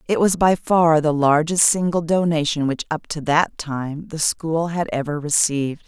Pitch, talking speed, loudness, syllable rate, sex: 160 Hz, 185 wpm, -19 LUFS, 4.4 syllables/s, female